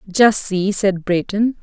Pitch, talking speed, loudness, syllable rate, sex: 200 Hz, 150 wpm, -17 LUFS, 3.9 syllables/s, female